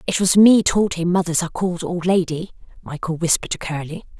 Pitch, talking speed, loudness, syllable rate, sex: 175 Hz, 200 wpm, -19 LUFS, 6.1 syllables/s, female